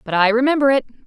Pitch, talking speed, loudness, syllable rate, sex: 245 Hz, 225 wpm, -16 LUFS, 7.6 syllables/s, female